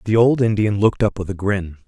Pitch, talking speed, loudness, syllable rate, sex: 105 Hz, 255 wpm, -18 LUFS, 6.0 syllables/s, male